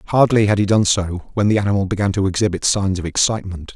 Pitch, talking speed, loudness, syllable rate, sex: 100 Hz, 225 wpm, -18 LUFS, 6.4 syllables/s, male